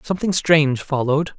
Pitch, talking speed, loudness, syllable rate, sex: 150 Hz, 130 wpm, -18 LUFS, 6.5 syllables/s, male